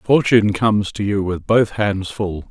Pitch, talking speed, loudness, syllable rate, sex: 105 Hz, 190 wpm, -18 LUFS, 4.5 syllables/s, male